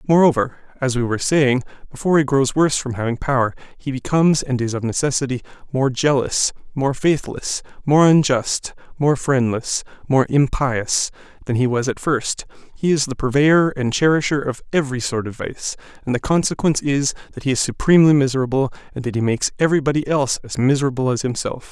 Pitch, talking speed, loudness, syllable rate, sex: 135 Hz, 175 wpm, -19 LUFS, 5.8 syllables/s, male